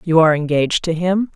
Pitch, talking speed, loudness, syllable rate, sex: 170 Hz, 220 wpm, -17 LUFS, 6.5 syllables/s, female